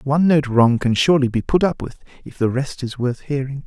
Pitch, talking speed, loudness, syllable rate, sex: 135 Hz, 245 wpm, -18 LUFS, 5.7 syllables/s, male